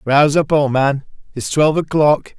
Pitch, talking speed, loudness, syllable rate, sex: 145 Hz, 175 wpm, -15 LUFS, 5.0 syllables/s, male